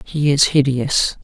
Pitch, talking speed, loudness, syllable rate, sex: 140 Hz, 145 wpm, -16 LUFS, 3.7 syllables/s, female